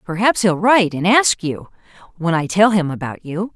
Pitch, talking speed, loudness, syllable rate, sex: 185 Hz, 205 wpm, -17 LUFS, 5.1 syllables/s, female